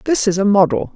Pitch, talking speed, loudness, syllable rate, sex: 215 Hz, 250 wpm, -15 LUFS, 6.2 syllables/s, female